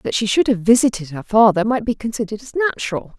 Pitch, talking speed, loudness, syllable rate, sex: 220 Hz, 225 wpm, -18 LUFS, 7.3 syllables/s, female